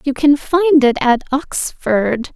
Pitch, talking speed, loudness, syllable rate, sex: 275 Hz, 155 wpm, -15 LUFS, 3.4 syllables/s, female